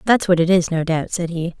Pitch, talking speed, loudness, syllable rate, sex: 170 Hz, 300 wpm, -18 LUFS, 5.6 syllables/s, female